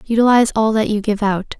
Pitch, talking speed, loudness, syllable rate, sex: 215 Hz, 225 wpm, -16 LUFS, 6.0 syllables/s, female